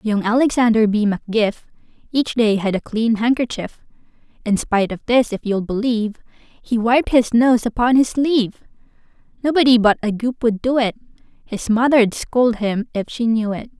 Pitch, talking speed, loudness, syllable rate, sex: 230 Hz, 170 wpm, -18 LUFS, 4.9 syllables/s, female